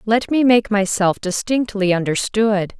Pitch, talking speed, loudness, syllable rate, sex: 210 Hz, 130 wpm, -18 LUFS, 4.1 syllables/s, female